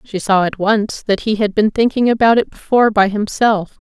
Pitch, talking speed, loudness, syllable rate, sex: 210 Hz, 215 wpm, -15 LUFS, 5.1 syllables/s, female